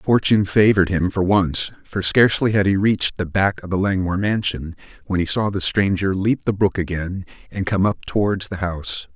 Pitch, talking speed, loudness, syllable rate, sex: 95 Hz, 205 wpm, -19 LUFS, 5.4 syllables/s, male